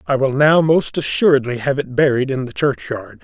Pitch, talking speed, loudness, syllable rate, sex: 140 Hz, 205 wpm, -17 LUFS, 5.2 syllables/s, male